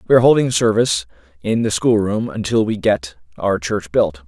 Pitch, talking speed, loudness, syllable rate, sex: 100 Hz, 180 wpm, -17 LUFS, 5.4 syllables/s, male